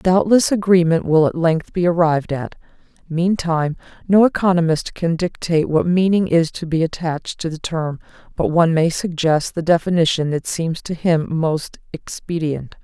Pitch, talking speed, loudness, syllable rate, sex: 165 Hz, 160 wpm, -18 LUFS, 4.9 syllables/s, female